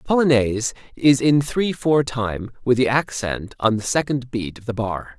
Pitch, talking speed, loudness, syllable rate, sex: 125 Hz, 195 wpm, -20 LUFS, 4.6 syllables/s, male